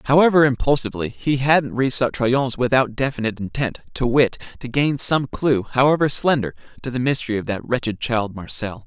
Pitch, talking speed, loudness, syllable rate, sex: 125 Hz, 170 wpm, -20 LUFS, 5.4 syllables/s, male